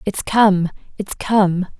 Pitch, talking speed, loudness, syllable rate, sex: 195 Hz, 100 wpm, -17 LUFS, 3.0 syllables/s, female